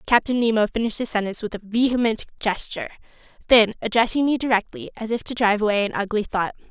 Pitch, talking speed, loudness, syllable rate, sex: 225 Hz, 190 wpm, -22 LUFS, 6.9 syllables/s, female